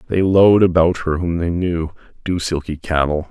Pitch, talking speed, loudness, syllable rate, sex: 85 Hz, 165 wpm, -17 LUFS, 5.0 syllables/s, male